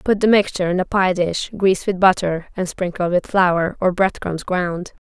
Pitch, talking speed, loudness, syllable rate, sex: 185 Hz, 215 wpm, -19 LUFS, 4.9 syllables/s, female